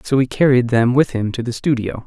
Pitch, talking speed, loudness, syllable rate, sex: 125 Hz, 260 wpm, -17 LUFS, 5.6 syllables/s, male